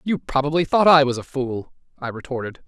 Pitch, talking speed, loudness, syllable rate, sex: 140 Hz, 200 wpm, -20 LUFS, 5.7 syllables/s, male